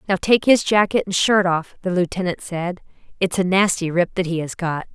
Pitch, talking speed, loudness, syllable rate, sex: 185 Hz, 220 wpm, -19 LUFS, 5.2 syllables/s, female